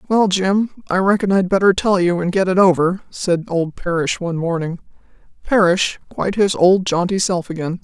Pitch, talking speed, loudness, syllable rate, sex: 185 Hz, 175 wpm, -17 LUFS, 5.2 syllables/s, female